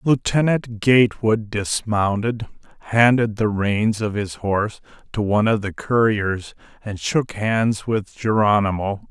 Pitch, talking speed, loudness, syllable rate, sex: 110 Hz, 125 wpm, -20 LUFS, 4.1 syllables/s, male